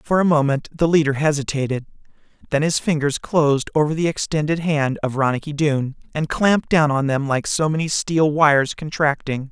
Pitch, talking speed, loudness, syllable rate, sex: 150 Hz, 175 wpm, -19 LUFS, 5.4 syllables/s, male